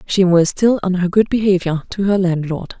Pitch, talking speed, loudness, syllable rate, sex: 185 Hz, 215 wpm, -16 LUFS, 5.1 syllables/s, female